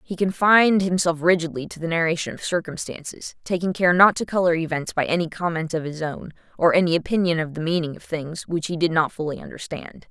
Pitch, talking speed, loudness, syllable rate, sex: 170 Hz, 210 wpm, -22 LUFS, 5.9 syllables/s, female